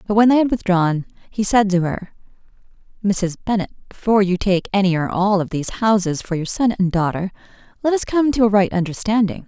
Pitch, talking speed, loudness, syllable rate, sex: 200 Hz, 205 wpm, -19 LUFS, 5.9 syllables/s, female